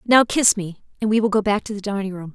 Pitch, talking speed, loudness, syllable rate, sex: 205 Hz, 305 wpm, -20 LUFS, 6.3 syllables/s, female